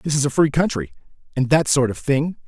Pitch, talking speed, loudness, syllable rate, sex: 140 Hz, 240 wpm, -19 LUFS, 5.8 syllables/s, male